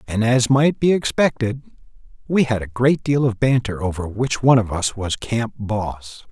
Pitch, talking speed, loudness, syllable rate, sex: 115 Hz, 190 wpm, -19 LUFS, 4.5 syllables/s, male